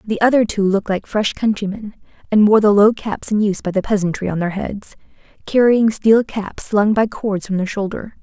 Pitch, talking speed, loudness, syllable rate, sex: 205 Hz, 210 wpm, -17 LUFS, 5.2 syllables/s, female